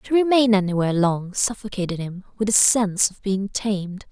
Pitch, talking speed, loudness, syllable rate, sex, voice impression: 200 Hz, 175 wpm, -20 LUFS, 5.4 syllables/s, female, very feminine, young, very thin, slightly tensed, slightly powerful, slightly dark, soft, clear, fluent, slightly raspy, cute, slightly intellectual, refreshing, sincere, calm, very friendly, very reassuring, very unique, elegant, slightly wild, very sweet, lively, very kind, modest, light